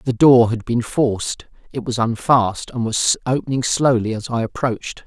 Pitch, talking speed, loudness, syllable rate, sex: 120 Hz, 180 wpm, -18 LUFS, 4.7 syllables/s, male